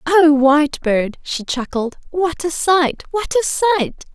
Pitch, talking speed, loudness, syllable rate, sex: 310 Hz, 145 wpm, -17 LUFS, 3.8 syllables/s, female